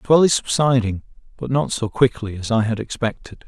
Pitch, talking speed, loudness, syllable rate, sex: 120 Hz, 205 wpm, -20 LUFS, 5.5 syllables/s, male